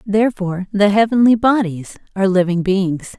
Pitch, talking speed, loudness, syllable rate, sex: 200 Hz, 130 wpm, -16 LUFS, 5.5 syllables/s, female